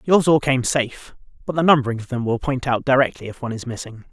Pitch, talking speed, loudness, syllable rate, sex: 130 Hz, 250 wpm, -20 LUFS, 6.5 syllables/s, male